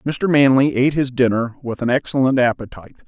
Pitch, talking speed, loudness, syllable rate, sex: 130 Hz, 175 wpm, -17 LUFS, 5.9 syllables/s, male